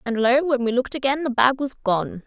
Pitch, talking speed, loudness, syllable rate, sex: 250 Hz, 265 wpm, -21 LUFS, 5.6 syllables/s, female